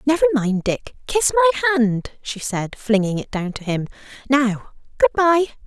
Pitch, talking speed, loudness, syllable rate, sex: 250 Hz, 170 wpm, -20 LUFS, 4.7 syllables/s, female